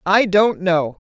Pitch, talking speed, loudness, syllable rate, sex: 185 Hz, 170 wpm, -17 LUFS, 3.4 syllables/s, female